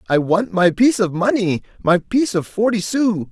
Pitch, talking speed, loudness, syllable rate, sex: 195 Hz, 200 wpm, -18 LUFS, 5.1 syllables/s, male